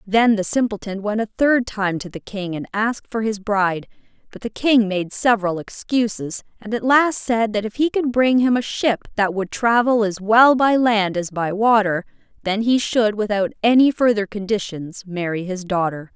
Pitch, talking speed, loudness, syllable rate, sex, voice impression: 215 Hz, 195 wpm, -19 LUFS, 4.7 syllables/s, female, very feminine, very adult-like, very thin, tensed, slightly powerful, very bright, soft, very clear, fluent, cool, very intellectual, refreshing, slightly sincere, calm, very friendly, reassuring, very unique, very elegant, slightly wild, sweet, very lively, kind, intense, sharp, light